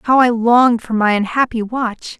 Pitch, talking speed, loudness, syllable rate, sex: 235 Hz, 190 wpm, -15 LUFS, 4.7 syllables/s, female